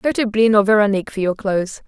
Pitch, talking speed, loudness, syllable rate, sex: 210 Hz, 255 wpm, -17 LUFS, 6.6 syllables/s, female